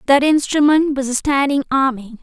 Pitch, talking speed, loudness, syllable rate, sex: 275 Hz, 160 wpm, -16 LUFS, 5.1 syllables/s, female